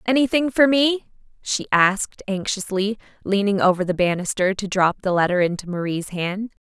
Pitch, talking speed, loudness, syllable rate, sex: 200 Hz, 155 wpm, -21 LUFS, 5.0 syllables/s, female